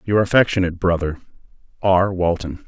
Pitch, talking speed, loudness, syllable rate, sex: 90 Hz, 110 wpm, -19 LUFS, 5.7 syllables/s, male